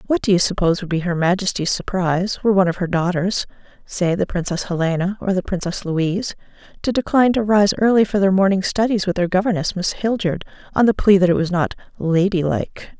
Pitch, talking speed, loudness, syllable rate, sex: 185 Hz, 200 wpm, -19 LUFS, 6.0 syllables/s, female